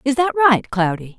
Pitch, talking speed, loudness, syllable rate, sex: 250 Hz, 205 wpm, -17 LUFS, 5.5 syllables/s, female